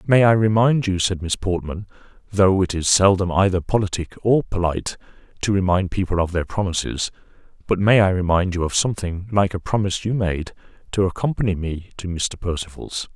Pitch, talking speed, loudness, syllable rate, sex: 95 Hz, 175 wpm, -20 LUFS, 5.6 syllables/s, male